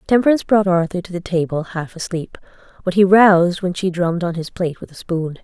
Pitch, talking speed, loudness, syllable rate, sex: 180 Hz, 220 wpm, -18 LUFS, 6.1 syllables/s, female